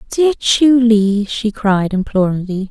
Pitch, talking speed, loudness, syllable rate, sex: 215 Hz, 110 wpm, -14 LUFS, 3.8 syllables/s, female